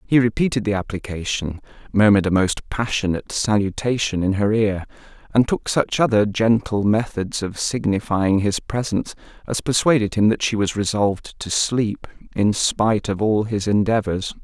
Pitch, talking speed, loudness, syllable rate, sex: 105 Hz, 155 wpm, -20 LUFS, 4.9 syllables/s, male